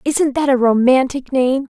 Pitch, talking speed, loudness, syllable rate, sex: 260 Hz, 170 wpm, -15 LUFS, 4.4 syllables/s, female